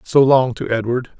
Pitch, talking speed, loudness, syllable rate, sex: 125 Hz, 200 wpm, -16 LUFS, 4.9 syllables/s, male